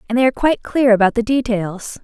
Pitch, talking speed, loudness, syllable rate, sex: 230 Hz, 235 wpm, -16 LUFS, 6.5 syllables/s, female